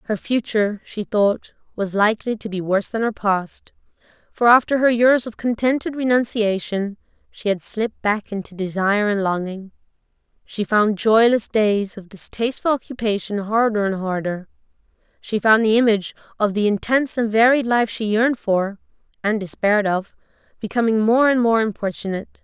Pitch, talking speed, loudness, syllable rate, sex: 215 Hz, 155 wpm, -20 LUFS, 5.2 syllables/s, female